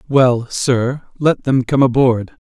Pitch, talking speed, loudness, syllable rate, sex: 130 Hz, 145 wpm, -16 LUFS, 3.5 syllables/s, male